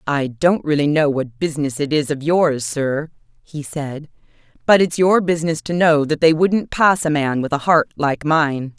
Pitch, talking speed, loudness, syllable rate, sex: 150 Hz, 205 wpm, -18 LUFS, 4.6 syllables/s, female